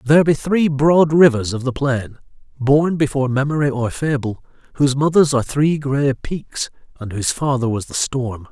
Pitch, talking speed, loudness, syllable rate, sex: 140 Hz, 175 wpm, -18 LUFS, 5.0 syllables/s, male